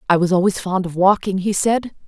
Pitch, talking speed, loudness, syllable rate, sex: 190 Hz, 230 wpm, -18 LUFS, 5.6 syllables/s, female